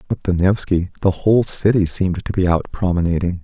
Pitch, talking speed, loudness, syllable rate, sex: 90 Hz, 190 wpm, -18 LUFS, 5.9 syllables/s, male